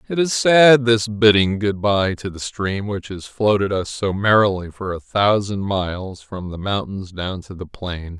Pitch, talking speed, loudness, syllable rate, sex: 100 Hz, 200 wpm, -19 LUFS, 4.2 syllables/s, male